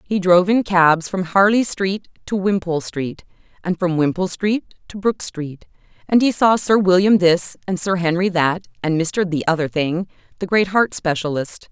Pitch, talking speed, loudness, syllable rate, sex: 180 Hz, 180 wpm, -18 LUFS, 4.8 syllables/s, female